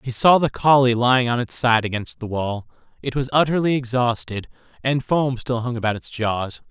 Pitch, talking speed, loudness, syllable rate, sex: 125 Hz, 195 wpm, -20 LUFS, 5.2 syllables/s, male